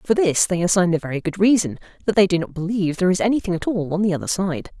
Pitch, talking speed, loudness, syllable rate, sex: 185 Hz, 275 wpm, -20 LUFS, 7.1 syllables/s, female